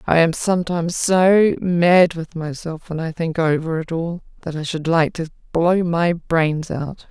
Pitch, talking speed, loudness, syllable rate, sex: 165 Hz, 175 wpm, -19 LUFS, 4.2 syllables/s, female